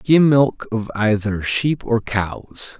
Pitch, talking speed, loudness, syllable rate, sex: 115 Hz, 150 wpm, -19 LUFS, 3.0 syllables/s, male